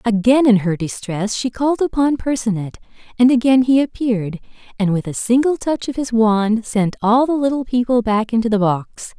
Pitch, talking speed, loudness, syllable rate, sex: 230 Hz, 190 wpm, -17 LUFS, 5.2 syllables/s, female